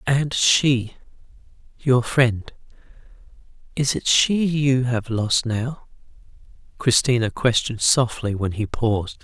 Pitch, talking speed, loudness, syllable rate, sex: 120 Hz, 95 wpm, -20 LUFS, 3.7 syllables/s, male